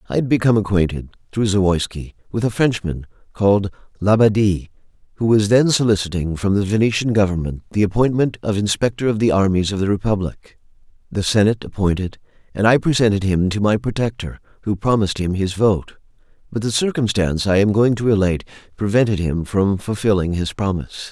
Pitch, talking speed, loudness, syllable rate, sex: 100 Hz, 165 wpm, -18 LUFS, 6.0 syllables/s, male